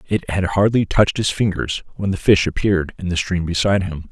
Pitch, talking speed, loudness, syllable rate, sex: 90 Hz, 220 wpm, -19 LUFS, 5.9 syllables/s, male